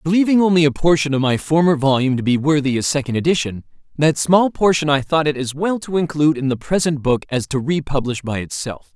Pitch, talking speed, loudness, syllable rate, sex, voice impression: 150 Hz, 220 wpm, -18 LUFS, 6.0 syllables/s, male, masculine, adult-like, tensed, powerful, bright, clear, fluent, cool, wild, lively, slightly strict